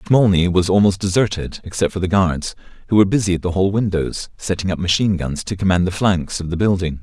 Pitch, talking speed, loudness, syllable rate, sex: 95 Hz, 220 wpm, -18 LUFS, 6.1 syllables/s, male